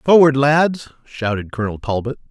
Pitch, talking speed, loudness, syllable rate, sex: 130 Hz, 130 wpm, -17 LUFS, 5.0 syllables/s, male